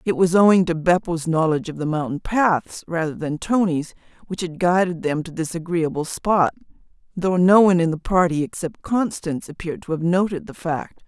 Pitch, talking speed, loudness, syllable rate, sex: 170 Hz, 190 wpm, -21 LUFS, 5.3 syllables/s, female